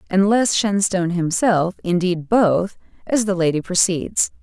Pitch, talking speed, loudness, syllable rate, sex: 185 Hz, 110 wpm, -18 LUFS, 4.2 syllables/s, female